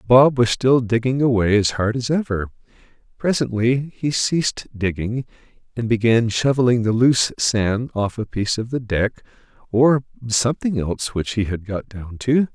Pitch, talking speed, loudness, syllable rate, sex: 120 Hz, 165 wpm, -20 LUFS, 4.7 syllables/s, male